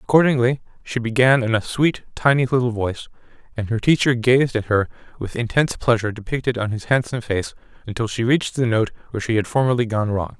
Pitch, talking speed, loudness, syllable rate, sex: 120 Hz, 195 wpm, -20 LUFS, 6.3 syllables/s, male